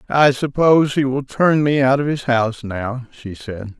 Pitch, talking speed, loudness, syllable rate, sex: 130 Hz, 205 wpm, -17 LUFS, 4.6 syllables/s, male